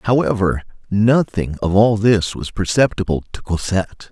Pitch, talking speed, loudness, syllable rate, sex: 100 Hz, 130 wpm, -18 LUFS, 4.6 syllables/s, male